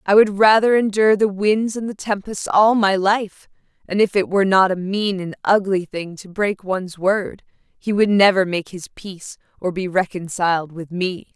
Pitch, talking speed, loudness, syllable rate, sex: 195 Hz, 195 wpm, -18 LUFS, 4.8 syllables/s, female